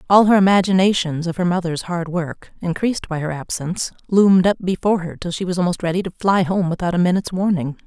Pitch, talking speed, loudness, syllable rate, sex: 180 Hz, 215 wpm, -19 LUFS, 6.3 syllables/s, female